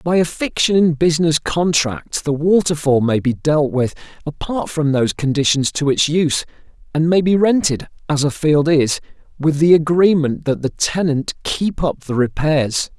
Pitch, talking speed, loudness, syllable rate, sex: 155 Hz, 170 wpm, -17 LUFS, 4.7 syllables/s, male